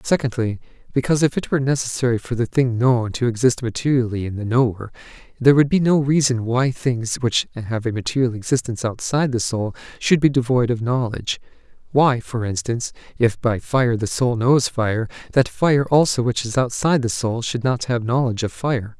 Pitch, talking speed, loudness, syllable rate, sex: 125 Hz, 190 wpm, -20 LUFS, 5.5 syllables/s, male